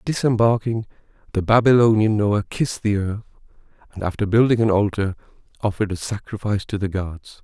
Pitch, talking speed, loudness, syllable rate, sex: 105 Hz, 145 wpm, -20 LUFS, 5.9 syllables/s, male